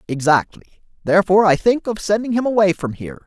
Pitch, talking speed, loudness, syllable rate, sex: 185 Hz, 185 wpm, -17 LUFS, 6.8 syllables/s, male